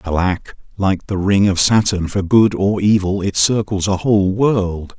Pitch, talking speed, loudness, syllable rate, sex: 100 Hz, 180 wpm, -16 LUFS, 4.3 syllables/s, male